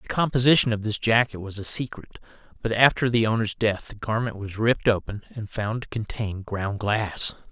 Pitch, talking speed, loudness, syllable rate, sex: 110 Hz, 190 wpm, -24 LUFS, 5.2 syllables/s, male